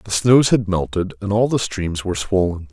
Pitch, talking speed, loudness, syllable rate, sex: 100 Hz, 220 wpm, -18 LUFS, 5.0 syllables/s, male